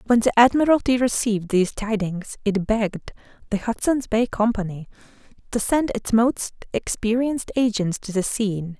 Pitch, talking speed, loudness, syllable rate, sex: 220 Hz, 145 wpm, -22 LUFS, 5.1 syllables/s, female